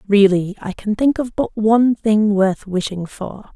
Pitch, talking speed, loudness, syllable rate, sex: 210 Hz, 185 wpm, -17 LUFS, 4.3 syllables/s, female